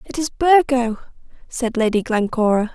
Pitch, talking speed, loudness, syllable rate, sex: 245 Hz, 130 wpm, -18 LUFS, 4.7 syllables/s, female